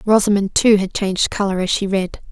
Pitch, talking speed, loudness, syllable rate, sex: 195 Hz, 210 wpm, -17 LUFS, 5.6 syllables/s, female